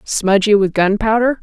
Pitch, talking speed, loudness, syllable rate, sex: 210 Hz, 125 wpm, -14 LUFS, 4.5 syllables/s, female